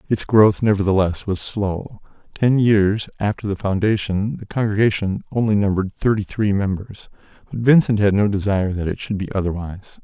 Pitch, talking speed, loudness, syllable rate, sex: 100 Hz, 160 wpm, -19 LUFS, 5.3 syllables/s, male